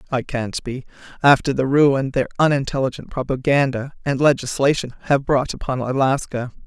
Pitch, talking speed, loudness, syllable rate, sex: 135 Hz, 135 wpm, -20 LUFS, 5.2 syllables/s, female